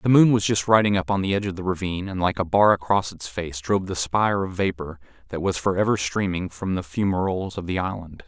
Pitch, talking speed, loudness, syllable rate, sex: 95 Hz, 255 wpm, -23 LUFS, 6.2 syllables/s, male